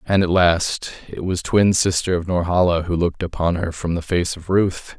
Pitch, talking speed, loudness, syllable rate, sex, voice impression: 90 Hz, 215 wpm, -19 LUFS, 4.9 syllables/s, male, very masculine, adult-like, slightly thick, cool, slightly calm, slightly elegant, slightly sweet